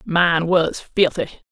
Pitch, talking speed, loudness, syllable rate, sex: 170 Hz, 120 wpm, -19 LUFS, 3.5 syllables/s, female